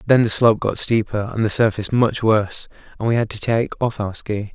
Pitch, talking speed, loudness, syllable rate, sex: 110 Hz, 240 wpm, -19 LUFS, 5.7 syllables/s, male